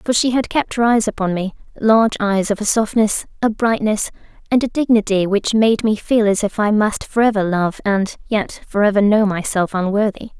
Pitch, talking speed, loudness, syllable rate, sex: 210 Hz, 210 wpm, -17 LUFS, 5.1 syllables/s, female